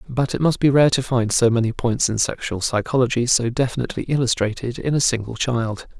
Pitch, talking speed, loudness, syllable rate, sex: 120 Hz, 200 wpm, -20 LUFS, 5.7 syllables/s, male